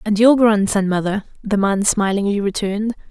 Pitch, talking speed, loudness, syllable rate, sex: 205 Hz, 155 wpm, -17 LUFS, 5.2 syllables/s, female